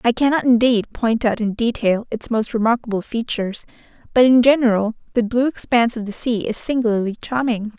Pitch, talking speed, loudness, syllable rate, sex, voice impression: 230 Hz, 175 wpm, -19 LUFS, 5.6 syllables/s, female, feminine, slightly young, tensed, bright, slightly soft, clear, slightly raspy, intellectual, calm, friendly, reassuring, elegant, lively, slightly kind